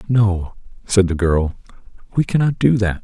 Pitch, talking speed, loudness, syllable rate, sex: 105 Hz, 160 wpm, -18 LUFS, 4.6 syllables/s, male